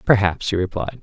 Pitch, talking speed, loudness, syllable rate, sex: 100 Hz, 175 wpm, -20 LUFS, 5.6 syllables/s, male